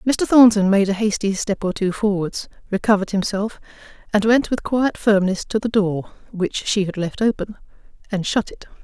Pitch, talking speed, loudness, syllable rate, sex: 205 Hz, 185 wpm, -19 LUFS, 4.6 syllables/s, female